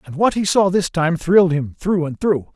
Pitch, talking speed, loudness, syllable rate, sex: 175 Hz, 260 wpm, -18 LUFS, 5.1 syllables/s, male